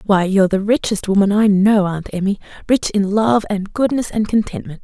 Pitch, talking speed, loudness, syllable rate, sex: 200 Hz, 200 wpm, -17 LUFS, 5.6 syllables/s, female